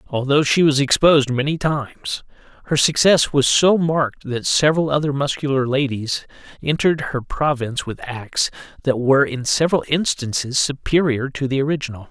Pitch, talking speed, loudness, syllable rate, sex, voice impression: 140 Hz, 150 wpm, -19 LUFS, 5.3 syllables/s, male, masculine, middle-aged, slightly relaxed, slightly powerful, slightly soft, slightly muffled, raspy, cool, mature, friendly, unique, slightly wild, lively, slightly kind